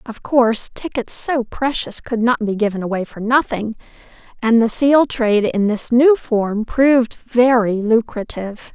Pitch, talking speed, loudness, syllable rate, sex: 230 Hz, 160 wpm, -17 LUFS, 4.4 syllables/s, female